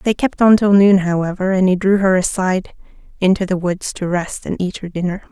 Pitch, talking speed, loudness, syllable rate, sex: 190 Hz, 225 wpm, -16 LUFS, 5.5 syllables/s, female